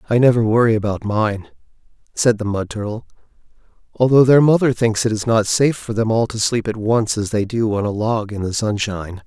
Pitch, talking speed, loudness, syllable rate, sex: 110 Hz, 215 wpm, -18 LUFS, 5.5 syllables/s, male